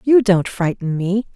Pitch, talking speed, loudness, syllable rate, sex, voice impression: 200 Hz, 175 wpm, -18 LUFS, 4.2 syllables/s, female, very feminine, very adult-like, slightly intellectual, slightly calm, elegant